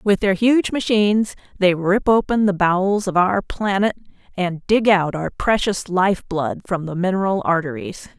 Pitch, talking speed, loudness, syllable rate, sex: 190 Hz, 170 wpm, -19 LUFS, 4.5 syllables/s, female